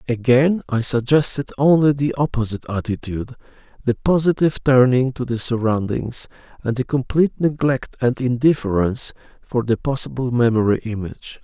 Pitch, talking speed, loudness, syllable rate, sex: 125 Hz, 125 wpm, -19 LUFS, 5.3 syllables/s, male